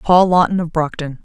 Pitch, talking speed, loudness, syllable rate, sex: 165 Hz, 195 wpm, -16 LUFS, 5.3 syllables/s, female